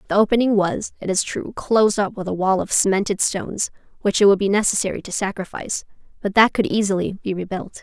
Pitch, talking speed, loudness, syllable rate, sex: 200 Hz, 205 wpm, -20 LUFS, 6.2 syllables/s, female